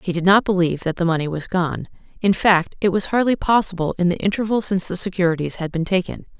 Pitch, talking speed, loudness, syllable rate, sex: 185 Hz, 225 wpm, -20 LUFS, 6.4 syllables/s, female